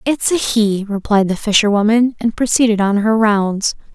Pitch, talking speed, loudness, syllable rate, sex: 215 Hz, 165 wpm, -15 LUFS, 4.7 syllables/s, female